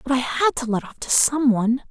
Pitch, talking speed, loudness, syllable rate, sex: 255 Hz, 285 wpm, -20 LUFS, 5.6 syllables/s, female